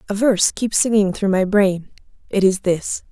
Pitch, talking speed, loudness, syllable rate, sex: 200 Hz, 195 wpm, -18 LUFS, 4.8 syllables/s, female